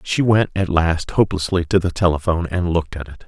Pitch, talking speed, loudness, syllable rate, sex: 90 Hz, 220 wpm, -19 LUFS, 6.1 syllables/s, male